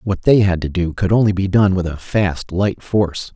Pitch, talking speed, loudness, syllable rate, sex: 95 Hz, 250 wpm, -17 LUFS, 4.9 syllables/s, male